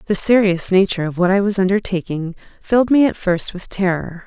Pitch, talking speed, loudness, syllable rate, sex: 190 Hz, 195 wpm, -17 LUFS, 5.7 syllables/s, female